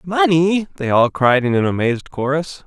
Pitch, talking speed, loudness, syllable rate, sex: 150 Hz, 180 wpm, -17 LUFS, 4.9 syllables/s, male